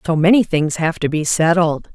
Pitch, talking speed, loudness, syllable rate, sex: 165 Hz, 215 wpm, -16 LUFS, 5.0 syllables/s, female